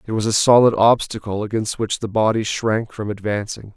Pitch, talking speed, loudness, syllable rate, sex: 110 Hz, 190 wpm, -19 LUFS, 5.3 syllables/s, male